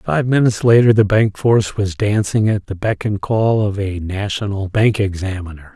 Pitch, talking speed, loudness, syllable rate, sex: 105 Hz, 190 wpm, -16 LUFS, 4.9 syllables/s, male